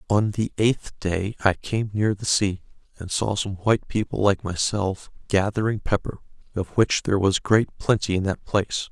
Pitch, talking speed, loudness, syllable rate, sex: 100 Hz, 180 wpm, -23 LUFS, 4.7 syllables/s, male